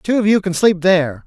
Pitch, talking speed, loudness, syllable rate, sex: 180 Hz, 285 wpm, -15 LUFS, 5.8 syllables/s, male